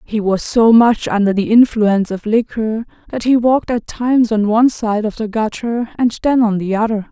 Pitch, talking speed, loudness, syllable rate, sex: 225 Hz, 210 wpm, -15 LUFS, 5.1 syllables/s, female